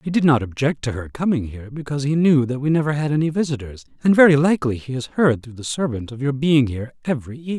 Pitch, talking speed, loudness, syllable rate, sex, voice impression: 140 Hz, 255 wpm, -20 LUFS, 7.0 syllables/s, male, very masculine, very adult-like, thick, cool, slightly intellectual, slightly calm